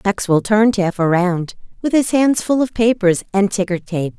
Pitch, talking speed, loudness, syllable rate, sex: 205 Hz, 185 wpm, -17 LUFS, 4.8 syllables/s, female